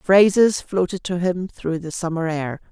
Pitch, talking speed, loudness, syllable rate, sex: 175 Hz, 175 wpm, -20 LUFS, 4.2 syllables/s, female